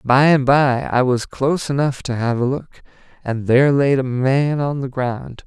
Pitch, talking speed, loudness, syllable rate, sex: 135 Hz, 210 wpm, -18 LUFS, 4.5 syllables/s, male